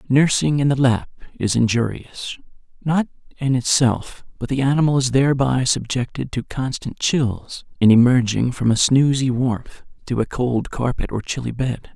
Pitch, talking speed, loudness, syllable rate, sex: 130 Hz, 155 wpm, -19 LUFS, 4.6 syllables/s, male